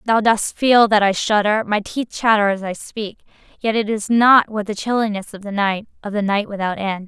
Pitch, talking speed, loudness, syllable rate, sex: 210 Hz, 210 wpm, -18 LUFS, 5.1 syllables/s, female